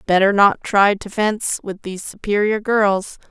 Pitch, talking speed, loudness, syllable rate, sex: 200 Hz, 165 wpm, -18 LUFS, 4.6 syllables/s, female